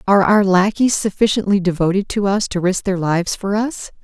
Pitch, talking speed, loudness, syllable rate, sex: 195 Hz, 195 wpm, -17 LUFS, 5.5 syllables/s, female